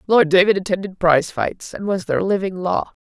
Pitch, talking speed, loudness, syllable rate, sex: 185 Hz, 200 wpm, -19 LUFS, 5.4 syllables/s, female